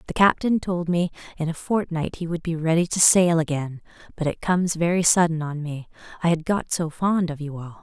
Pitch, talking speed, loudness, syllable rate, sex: 165 Hz, 220 wpm, -22 LUFS, 5.4 syllables/s, female